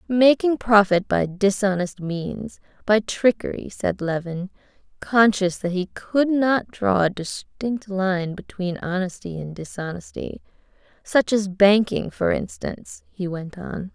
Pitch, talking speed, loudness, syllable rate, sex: 200 Hz, 130 wpm, -22 LUFS, 3.9 syllables/s, female